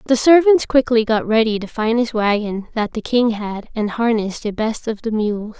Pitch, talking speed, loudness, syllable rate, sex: 225 Hz, 205 wpm, -18 LUFS, 4.9 syllables/s, female